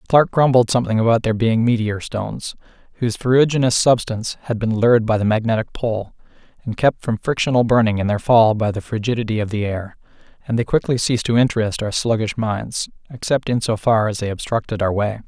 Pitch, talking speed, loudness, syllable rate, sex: 115 Hz, 195 wpm, -18 LUFS, 5.9 syllables/s, male